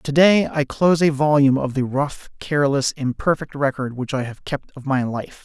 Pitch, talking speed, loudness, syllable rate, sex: 140 Hz, 210 wpm, -20 LUFS, 5.1 syllables/s, male